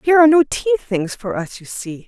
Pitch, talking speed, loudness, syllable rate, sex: 245 Hz, 260 wpm, -18 LUFS, 6.0 syllables/s, female